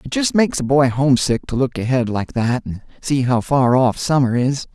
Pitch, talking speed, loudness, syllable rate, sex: 130 Hz, 230 wpm, -18 LUFS, 5.3 syllables/s, male